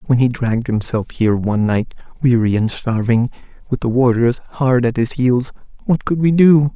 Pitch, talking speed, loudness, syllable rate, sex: 125 Hz, 185 wpm, -16 LUFS, 5.1 syllables/s, male